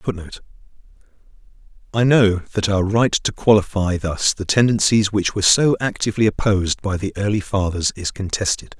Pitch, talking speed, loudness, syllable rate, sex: 100 Hz, 150 wpm, -18 LUFS, 5.4 syllables/s, male